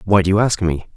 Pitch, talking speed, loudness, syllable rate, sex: 95 Hz, 315 wpm, -17 LUFS, 6.2 syllables/s, male